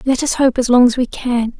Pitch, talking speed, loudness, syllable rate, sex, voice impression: 250 Hz, 300 wpm, -15 LUFS, 5.4 syllables/s, female, very feminine, slightly adult-like, very thin, slightly tensed, weak, slightly bright, soft, clear, slightly muffled, slightly fluent, halting, very cute, intellectual, slightly refreshing, slightly sincere, very calm, very friendly, reassuring, unique, elegant, slightly wild, very sweet, lively, kind, slightly sharp, very modest